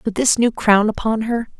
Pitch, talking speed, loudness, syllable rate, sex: 220 Hz, 225 wpm, -17 LUFS, 5.0 syllables/s, female